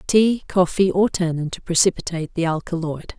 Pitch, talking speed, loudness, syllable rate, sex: 175 Hz, 150 wpm, -20 LUFS, 5.3 syllables/s, female